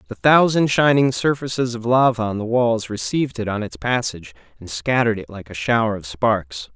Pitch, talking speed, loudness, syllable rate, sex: 115 Hz, 195 wpm, -19 LUFS, 5.4 syllables/s, male